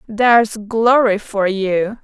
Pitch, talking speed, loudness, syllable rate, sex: 215 Hz, 120 wpm, -15 LUFS, 3.2 syllables/s, female